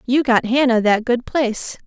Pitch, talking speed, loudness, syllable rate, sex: 245 Hz, 195 wpm, -17 LUFS, 4.8 syllables/s, female